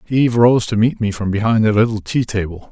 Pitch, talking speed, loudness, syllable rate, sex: 110 Hz, 245 wpm, -16 LUFS, 5.9 syllables/s, male